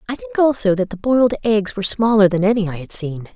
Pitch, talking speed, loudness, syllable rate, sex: 200 Hz, 250 wpm, -18 LUFS, 6.3 syllables/s, female